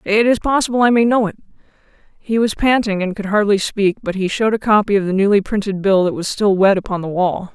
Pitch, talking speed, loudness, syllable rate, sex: 205 Hz, 245 wpm, -16 LUFS, 6.1 syllables/s, female